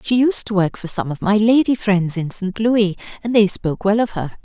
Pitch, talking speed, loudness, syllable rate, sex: 205 Hz, 255 wpm, -18 LUFS, 5.3 syllables/s, female